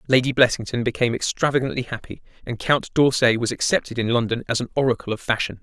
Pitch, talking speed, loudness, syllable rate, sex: 120 Hz, 180 wpm, -21 LUFS, 6.7 syllables/s, male